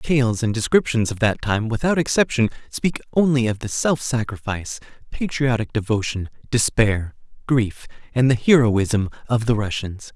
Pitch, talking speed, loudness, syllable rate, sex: 120 Hz, 150 wpm, -21 LUFS, 4.8 syllables/s, male